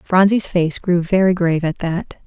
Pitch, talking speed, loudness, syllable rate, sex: 175 Hz, 185 wpm, -17 LUFS, 4.7 syllables/s, female